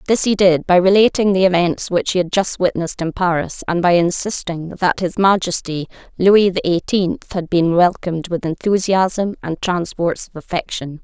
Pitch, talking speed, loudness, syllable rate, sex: 180 Hz, 175 wpm, -17 LUFS, 4.8 syllables/s, female